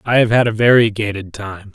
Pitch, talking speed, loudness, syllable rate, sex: 110 Hz, 205 wpm, -14 LUFS, 5.5 syllables/s, male